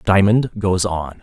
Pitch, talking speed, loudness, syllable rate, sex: 95 Hz, 145 wpm, -17 LUFS, 3.8 syllables/s, male